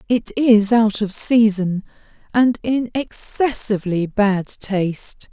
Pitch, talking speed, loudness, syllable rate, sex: 215 Hz, 115 wpm, -18 LUFS, 3.6 syllables/s, female